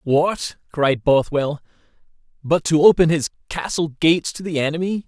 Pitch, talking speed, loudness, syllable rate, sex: 160 Hz, 140 wpm, -19 LUFS, 4.7 syllables/s, male